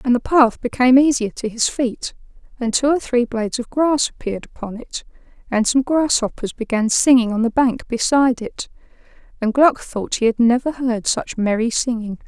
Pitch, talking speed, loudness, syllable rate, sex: 245 Hz, 185 wpm, -18 LUFS, 5.1 syllables/s, female